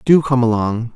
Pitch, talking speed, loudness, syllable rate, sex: 125 Hz, 190 wpm, -16 LUFS, 4.7 syllables/s, male